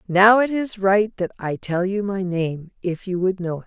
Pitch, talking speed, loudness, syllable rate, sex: 190 Hz, 245 wpm, -21 LUFS, 4.5 syllables/s, female